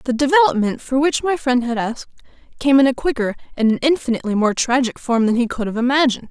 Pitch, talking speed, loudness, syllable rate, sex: 255 Hz, 220 wpm, -18 LUFS, 6.6 syllables/s, female